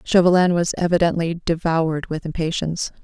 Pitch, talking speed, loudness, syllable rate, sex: 165 Hz, 120 wpm, -20 LUFS, 5.8 syllables/s, female